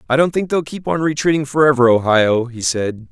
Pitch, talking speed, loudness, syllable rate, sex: 135 Hz, 210 wpm, -16 LUFS, 5.5 syllables/s, male